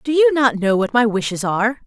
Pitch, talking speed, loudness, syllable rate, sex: 230 Hz, 255 wpm, -17 LUFS, 5.8 syllables/s, female